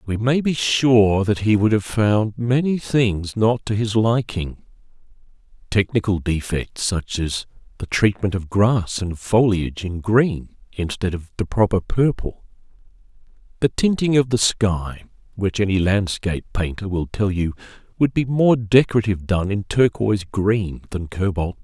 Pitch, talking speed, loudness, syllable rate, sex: 105 Hz, 155 wpm, -20 LUFS, 4.4 syllables/s, male